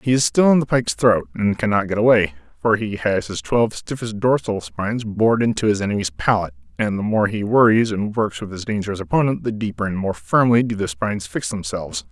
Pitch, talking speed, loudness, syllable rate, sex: 105 Hz, 225 wpm, -20 LUFS, 6.0 syllables/s, male